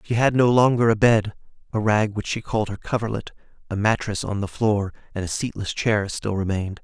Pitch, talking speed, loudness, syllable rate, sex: 105 Hz, 210 wpm, -22 LUFS, 5.6 syllables/s, male